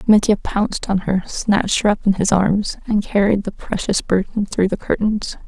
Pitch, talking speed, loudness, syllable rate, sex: 200 Hz, 195 wpm, -18 LUFS, 4.9 syllables/s, female